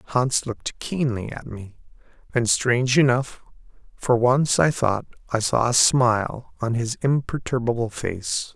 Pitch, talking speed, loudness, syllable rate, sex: 120 Hz, 140 wpm, -22 LUFS, 4.1 syllables/s, male